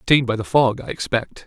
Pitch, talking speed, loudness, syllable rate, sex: 120 Hz, 245 wpm, -20 LUFS, 6.8 syllables/s, male